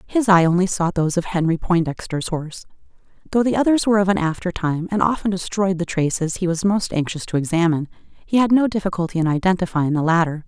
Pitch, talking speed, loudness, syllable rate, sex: 180 Hz, 205 wpm, -20 LUFS, 6.2 syllables/s, female